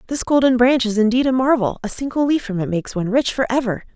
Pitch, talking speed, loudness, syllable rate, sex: 240 Hz, 260 wpm, -18 LUFS, 6.6 syllables/s, female